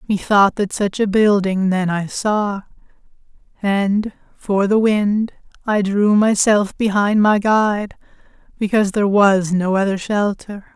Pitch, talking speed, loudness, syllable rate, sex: 200 Hz, 135 wpm, -17 LUFS, 4.0 syllables/s, female